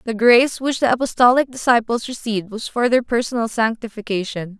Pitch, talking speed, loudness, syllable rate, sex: 235 Hz, 155 wpm, -18 LUFS, 5.8 syllables/s, female